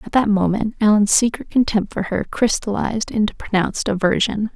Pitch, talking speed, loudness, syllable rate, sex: 210 Hz, 160 wpm, -19 LUFS, 5.5 syllables/s, female